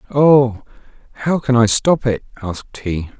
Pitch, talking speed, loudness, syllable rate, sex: 120 Hz, 150 wpm, -16 LUFS, 4.5 syllables/s, male